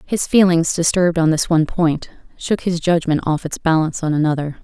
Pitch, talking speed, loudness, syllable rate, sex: 165 Hz, 195 wpm, -17 LUFS, 5.7 syllables/s, female